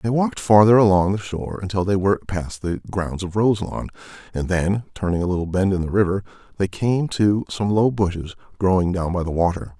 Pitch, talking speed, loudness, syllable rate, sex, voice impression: 95 Hz, 210 wpm, -21 LUFS, 5.7 syllables/s, male, very masculine, very adult-like, very middle-aged, very thick, tensed, very powerful, bright, soft, muffled, fluent, slightly raspy, very cool, intellectual, slightly refreshing, sincere, calm, very mature, very friendly, very reassuring, very unique, slightly elegant, very wild, sweet, slightly lively, kind